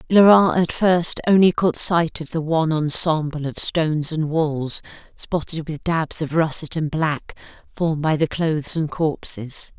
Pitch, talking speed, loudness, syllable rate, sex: 160 Hz, 165 wpm, -20 LUFS, 4.2 syllables/s, female